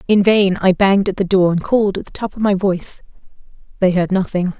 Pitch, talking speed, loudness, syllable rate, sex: 190 Hz, 220 wpm, -16 LUFS, 6.1 syllables/s, female